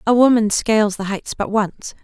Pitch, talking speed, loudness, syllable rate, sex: 215 Hz, 205 wpm, -18 LUFS, 4.8 syllables/s, female